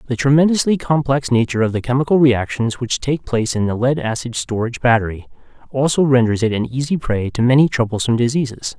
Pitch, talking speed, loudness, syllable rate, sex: 125 Hz, 185 wpm, -17 LUFS, 6.3 syllables/s, male